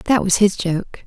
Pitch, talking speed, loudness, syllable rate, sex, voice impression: 195 Hz, 225 wpm, -18 LUFS, 3.9 syllables/s, female, very feminine, young, very thin, relaxed, very weak, slightly bright, very soft, muffled, fluent, raspy, very cute, very intellectual, refreshing, very sincere, very calm, very friendly, very reassuring, unique, very elegant, slightly wild, very sweet, slightly lively, very kind, very modest, very light